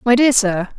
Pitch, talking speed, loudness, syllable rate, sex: 230 Hz, 230 wpm, -15 LUFS, 4.7 syllables/s, female